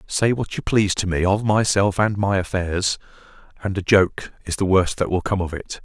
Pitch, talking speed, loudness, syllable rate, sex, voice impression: 95 Hz, 225 wpm, -21 LUFS, 5.1 syllables/s, male, masculine, adult-like, slightly powerful, clear, fluent, cool, slightly sincere, calm, wild, slightly strict, slightly sharp